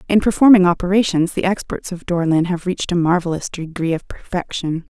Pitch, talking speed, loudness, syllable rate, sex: 180 Hz, 180 wpm, -18 LUFS, 5.7 syllables/s, female